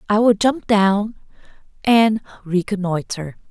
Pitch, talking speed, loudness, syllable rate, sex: 205 Hz, 105 wpm, -18 LUFS, 3.8 syllables/s, female